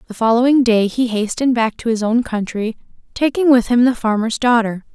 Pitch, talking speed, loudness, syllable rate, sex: 235 Hz, 195 wpm, -16 LUFS, 5.5 syllables/s, female